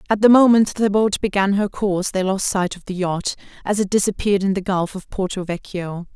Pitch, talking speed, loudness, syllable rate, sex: 195 Hz, 225 wpm, -19 LUFS, 5.5 syllables/s, female